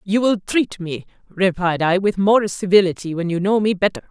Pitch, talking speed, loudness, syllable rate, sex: 190 Hz, 205 wpm, -18 LUFS, 5.2 syllables/s, female